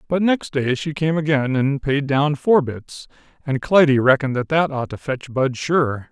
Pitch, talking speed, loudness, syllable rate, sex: 140 Hz, 205 wpm, -19 LUFS, 4.5 syllables/s, male